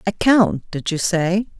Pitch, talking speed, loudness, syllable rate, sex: 190 Hz, 190 wpm, -18 LUFS, 3.6 syllables/s, female